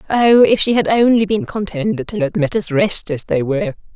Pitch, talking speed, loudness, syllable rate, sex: 190 Hz, 215 wpm, -16 LUFS, 5.3 syllables/s, female